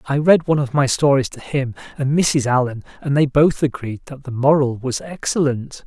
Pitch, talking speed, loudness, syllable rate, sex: 140 Hz, 205 wpm, -18 LUFS, 5.1 syllables/s, male